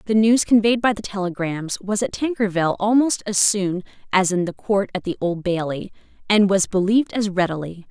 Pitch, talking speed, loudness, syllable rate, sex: 195 Hz, 190 wpm, -20 LUFS, 5.3 syllables/s, female